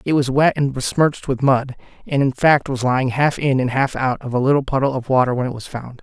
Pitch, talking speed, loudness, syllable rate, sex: 135 Hz, 270 wpm, -18 LUFS, 5.9 syllables/s, male